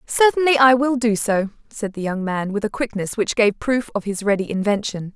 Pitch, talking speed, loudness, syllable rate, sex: 220 Hz, 220 wpm, -20 LUFS, 5.2 syllables/s, female